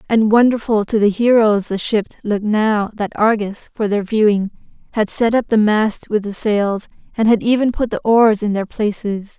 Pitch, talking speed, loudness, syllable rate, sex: 215 Hz, 200 wpm, -16 LUFS, 4.8 syllables/s, female